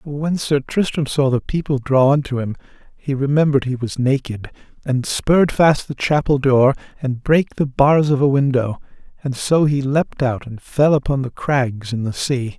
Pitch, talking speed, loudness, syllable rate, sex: 135 Hz, 190 wpm, -18 LUFS, 4.6 syllables/s, male